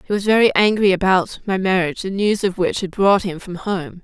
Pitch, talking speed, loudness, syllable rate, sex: 190 Hz, 240 wpm, -18 LUFS, 5.4 syllables/s, female